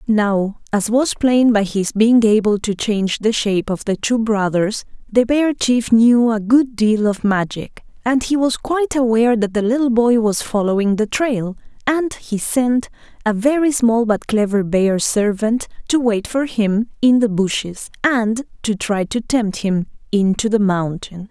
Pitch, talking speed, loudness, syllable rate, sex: 225 Hz, 180 wpm, -17 LUFS, 4.2 syllables/s, female